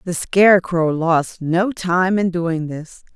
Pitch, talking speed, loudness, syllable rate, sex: 175 Hz, 150 wpm, -17 LUFS, 3.4 syllables/s, female